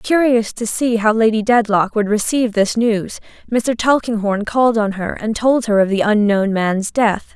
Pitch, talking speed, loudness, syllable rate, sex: 220 Hz, 190 wpm, -16 LUFS, 4.6 syllables/s, female